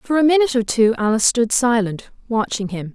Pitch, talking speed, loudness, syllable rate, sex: 235 Hz, 205 wpm, -18 LUFS, 5.9 syllables/s, female